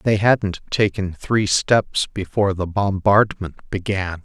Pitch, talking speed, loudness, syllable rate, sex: 100 Hz, 125 wpm, -20 LUFS, 3.7 syllables/s, male